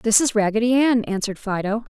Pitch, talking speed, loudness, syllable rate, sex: 220 Hz, 185 wpm, -20 LUFS, 6.0 syllables/s, female